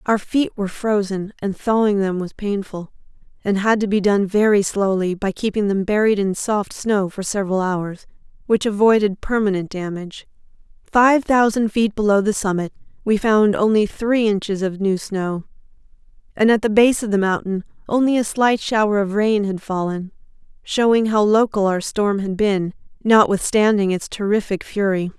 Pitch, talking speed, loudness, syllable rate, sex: 205 Hz, 165 wpm, -19 LUFS, 4.9 syllables/s, female